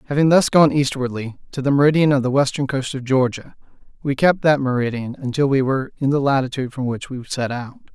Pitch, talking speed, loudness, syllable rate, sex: 135 Hz, 210 wpm, -19 LUFS, 6.2 syllables/s, male